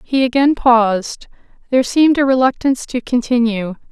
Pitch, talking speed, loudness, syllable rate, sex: 250 Hz, 140 wpm, -15 LUFS, 5.5 syllables/s, female